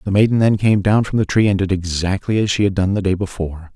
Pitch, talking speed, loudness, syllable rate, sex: 100 Hz, 290 wpm, -17 LUFS, 6.3 syllables/s, male